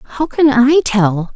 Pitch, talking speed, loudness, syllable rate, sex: 250 Hz, 175 wpm, -13 LUFS, 4.3 syllables/s, female